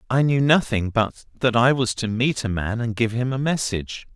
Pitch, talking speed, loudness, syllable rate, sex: 120 Hz, 230 wpm, -21 LUFS, 5.1 syllables/s, male